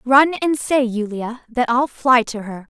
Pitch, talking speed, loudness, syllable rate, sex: 245 Hz, 195 wpm, -18 LUFS, 3.9 syllables/s, female